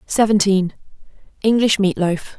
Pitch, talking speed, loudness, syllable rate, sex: 200 Hz, 75 wpm, -17 LUFS, 4.4 syllables/s, female